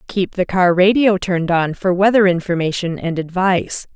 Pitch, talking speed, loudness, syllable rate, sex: 180 Hz, 165 wpm, -16 LUFS, 5.1 syllables/s, female